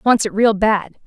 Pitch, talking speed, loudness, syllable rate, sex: 210 Hz, 225 wpm, -16 LUFS, 4.6 syllables/s, female